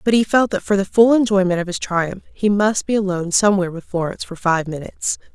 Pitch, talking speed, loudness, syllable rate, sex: 195 Hz, 235 wpm, -18 LUFS, 6.4 syllables/s, female